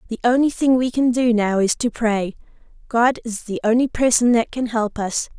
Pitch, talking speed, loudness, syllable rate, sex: 235 Hz, 210 wpm, -19 LUFS, 5.0 syllables/s, female